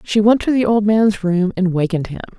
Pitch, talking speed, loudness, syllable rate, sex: 200 Hz, 250 wpm, -16 LUFS, 5.7 syllables/s, female